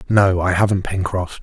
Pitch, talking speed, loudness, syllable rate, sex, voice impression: 95 Hz, 170 wpm, -18 LUFS, 4.9 syllables/s, male, very masculine, very adult-like, old, very relaxed, very weak, dark, soft, very muffled, fluent, raspy, very cool, very intellectual, very sincere, very calm, very mature, very friendly, reassuring, very unique, elegant, slightly wild, very sweet, very kind, very modest